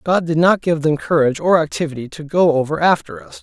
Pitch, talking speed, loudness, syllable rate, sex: 150 Hz, 230 wpm, -17 LUFS, 6.0 syllables/s, male